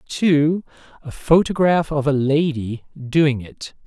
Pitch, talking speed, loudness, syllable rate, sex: 150 Hz, 125 wpm, -19 LUFS, 4.3 syllables/s, male